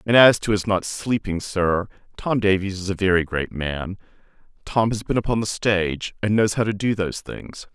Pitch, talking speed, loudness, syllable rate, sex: 100 Hz, 210 wpm, -22 LUFS, 5.1 syllables/s, male